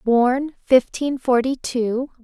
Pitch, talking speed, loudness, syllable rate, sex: 255 Hz, 105 wpm, -20 LUFS, 3.2 syllables/s, female